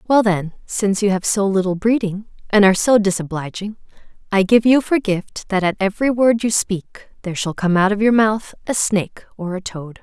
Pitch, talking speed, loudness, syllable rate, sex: 200 Hz, 210 wpm, -18 LUFS, 5.4 syllables/s, female